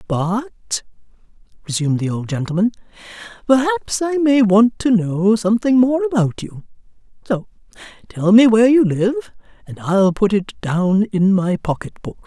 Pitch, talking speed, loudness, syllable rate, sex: 210 Hz, 145 wpm, -17 LUFS, 4.6 syllables/s, female